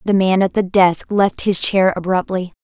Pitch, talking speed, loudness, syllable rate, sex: 190 Hz, 205 wpm, -16 LUFS, 4.6 syllables/s, female